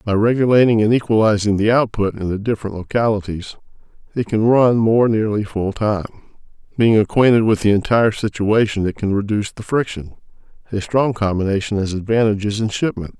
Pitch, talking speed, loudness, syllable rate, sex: 105 Hz, 160 wpm, -17 LUFS, 5.7 syllables/s, male